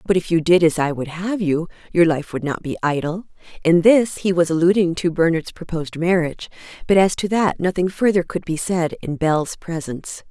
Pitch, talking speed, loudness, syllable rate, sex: 170 Hz, 210 wpm, -19 LUFS, 5.3 syllables/s, female